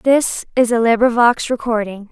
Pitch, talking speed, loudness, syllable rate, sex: 235 Hz, 140 wpm, -16 LUFS, 4.6 syllables/s, female